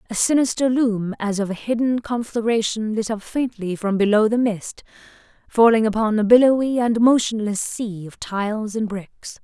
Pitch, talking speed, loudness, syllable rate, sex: 220 Hz, 165 wpm, -20 LUFS, 4.8 syllables/s, female